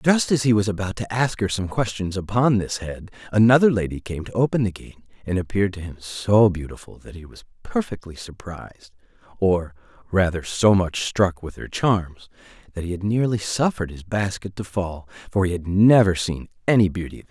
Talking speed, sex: 200 wpm, male